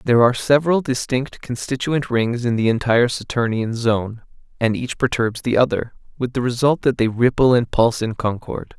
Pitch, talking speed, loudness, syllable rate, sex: 120 Hz, 180 wpm, -19 LUFS, 5.3 syllables/s, male